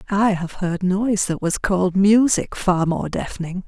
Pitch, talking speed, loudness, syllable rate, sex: 190 Hz, 180 wpm, -20 LUFS, 4.6 syllables/s, female